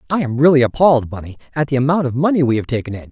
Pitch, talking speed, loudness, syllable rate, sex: 135 Hz, 270 wpm, -16 LUFS, 7.8 syllables/s, male